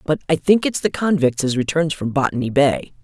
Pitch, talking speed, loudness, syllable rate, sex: 150 Hz, 220 wpm, -18 LUFS, 5.4 syllables/s, female